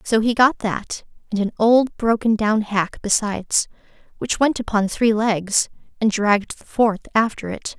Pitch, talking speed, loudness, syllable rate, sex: 215 Hz, 170 wpm, -20 LUFS, 4.4 syllables/s, female